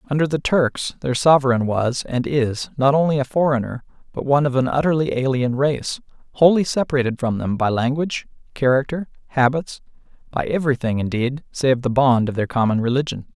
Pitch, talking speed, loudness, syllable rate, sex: 135 Hz, 165 wpm, -20 LUFS, 5.7 syllables/s, male